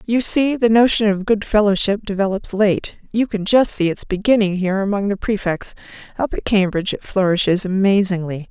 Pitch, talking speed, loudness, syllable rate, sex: 200 Hz, 175 wpm, -18 LUFS, 5.4 syllables/s, female